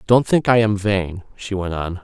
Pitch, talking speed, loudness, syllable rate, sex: 100 Hz, 235 wpm, -19 LUFS, 4.5 syllables/s, male